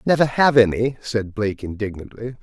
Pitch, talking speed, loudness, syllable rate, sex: 115 Hz, 150 wpm, -20 LUFS, 5.4 syllables/s, male